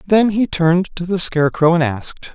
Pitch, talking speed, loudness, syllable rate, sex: 170 Hz, 205 wpm, -16 LUFS, 5.7 syllables/s, male